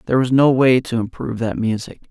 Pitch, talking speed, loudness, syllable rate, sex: 120 Hz, 230 wpm, -18 LUFS, 6.2 syllables/s, male